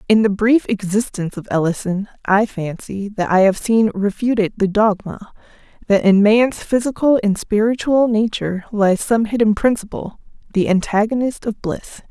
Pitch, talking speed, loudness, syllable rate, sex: 210 Hz, 145 wpm, -17 LUFS, 4.8 syllables/s, female